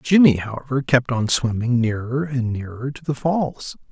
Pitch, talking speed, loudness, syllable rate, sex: 130 Hz, 170 wpm, -21 LUFS, 4.6 syllables/s, male